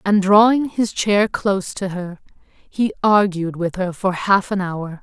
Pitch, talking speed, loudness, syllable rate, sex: 195 Hz, 180 wpm, -18 LUFS, 3.9 syllables/s, female